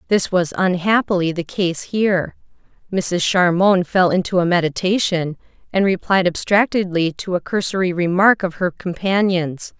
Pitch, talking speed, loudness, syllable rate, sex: 185 Hz, 135 wpm, -18 LUFS, 4.6 syllables/s, female